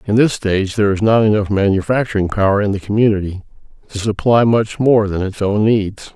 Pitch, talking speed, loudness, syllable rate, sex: 105 Hz, 195 wpm, -15 LUFS, 5.8 syllables/s, male